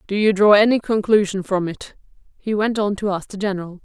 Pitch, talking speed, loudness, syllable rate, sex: 200 Hz, 220 wpm, -19 LUFS, 5.8 syllables/s, female